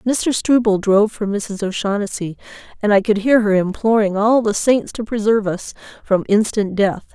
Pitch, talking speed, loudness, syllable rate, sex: 210 Hz, 175 wpm, -17 LUFS, 4.9 syllables/s, female